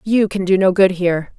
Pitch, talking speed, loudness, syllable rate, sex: 190 Hz, 260 wpm, -16 LUFS, 5.5 syllables/s, female